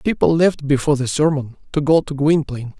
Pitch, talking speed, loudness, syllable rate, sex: 145 Hz, 195 wpm, -18 LUFS, 5.8 syllables/s, male